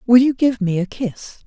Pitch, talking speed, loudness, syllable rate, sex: 220 Hz, 245 wpm, -18 LUFS, 4.7 syllables/s, female